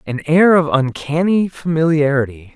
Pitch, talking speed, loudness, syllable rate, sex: 155 Hz, 115 wpm, -15 LUFS, 4.6 syllables/s, male